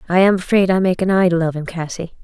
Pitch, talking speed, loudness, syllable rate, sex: 180 Hz, 270 wpm, -17 LUFS, 6.5 syllables/s, female